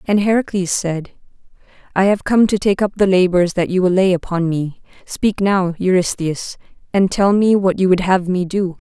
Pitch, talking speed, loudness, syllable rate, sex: 185 Hz, 195 wpm, -16 LUFS, 4.8 syllables/s, female